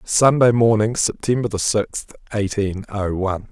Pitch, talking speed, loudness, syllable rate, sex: 105 Hz, 120 wpm, -19 LUFS, 3.4 syllables/s, male